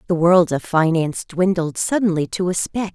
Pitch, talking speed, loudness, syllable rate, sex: 175 Hz, 185 wpm, -19 LUFS, 5.1 syllables/s, female